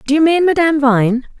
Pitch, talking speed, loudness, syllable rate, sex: 285 Hz, 215 wpm, -13 LUFS, 6.1 syllables/s, female